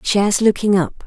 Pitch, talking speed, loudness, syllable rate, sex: 200 Hz, 170 wpm, -16 LUFS, 5.2 syllables/s, female